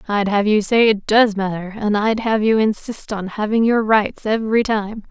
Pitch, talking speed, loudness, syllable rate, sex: 215 Hz, 210 wpm, -18 LUFS, 4.7 syllables/s, female